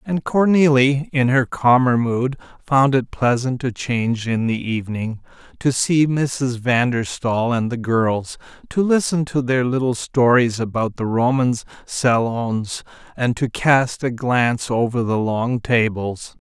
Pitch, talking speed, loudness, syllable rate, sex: 125 Hz, 155 wpm, -19 LUFS, 3.9 syllables/s, male